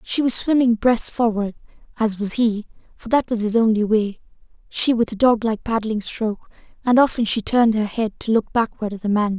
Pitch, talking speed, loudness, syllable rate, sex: 225 Hz, 200 wpm, -20 LUFS, 5.3 syllables/s, female